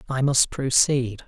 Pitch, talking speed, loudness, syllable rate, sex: 130 Hz, 140 wpm, -21 LUFS, 3.7 syllables/s, male